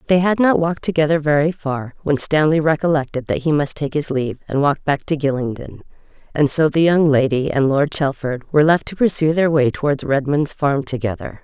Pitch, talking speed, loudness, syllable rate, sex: 150 Hz, 205 wpm, -18 LUFS, 5.6 syllables/s, female